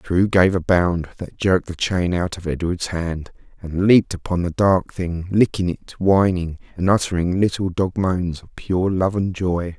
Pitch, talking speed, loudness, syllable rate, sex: 90 Hz, 190 wpm, -20 LUFS, 4.4 syllables/s, male